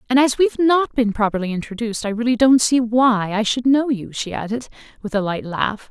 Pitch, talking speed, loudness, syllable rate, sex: 235 Hz, 225 wpm, -19 LUFS, 5.6 syllables/s, female